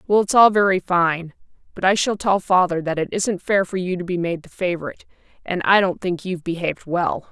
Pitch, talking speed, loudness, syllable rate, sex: 180 Hz, 230 wpm, -20 LUFS, 5.7 syllables/s, female